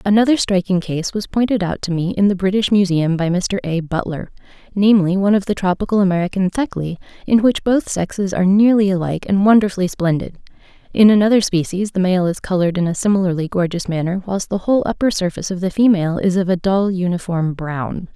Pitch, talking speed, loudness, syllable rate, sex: 190 Hz, 195 wpm, -17 LUFS, 6.1 syllables/s, female